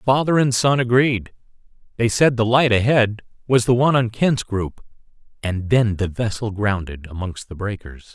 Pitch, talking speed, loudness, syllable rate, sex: 110 Hz, 170 wpm, -19 LUFS, 4.7 syllables/s, male